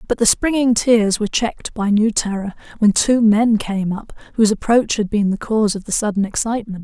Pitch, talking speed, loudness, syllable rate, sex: 215 Hz, 210 wpm, -17 LUFS, 5.6 syllables/s, female